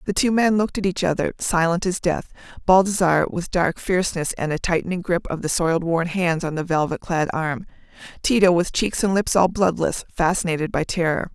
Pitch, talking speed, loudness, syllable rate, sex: 175 Hz, 200 wpm, -21 LUFS, 5.5 syllables/s, female